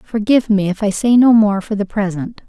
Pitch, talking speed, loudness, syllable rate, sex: 210 Hz, 240 wpm, -15 LUFS, 5.4 syllables/s, female